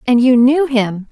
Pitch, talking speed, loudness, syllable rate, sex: 250 Hz, 215 wpm, -13 LUFS, 4.1 syllables/s, female